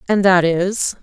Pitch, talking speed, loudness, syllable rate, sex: 185 Hz, 175 wpm, -16 LUFS, 3.7 syllables/s, female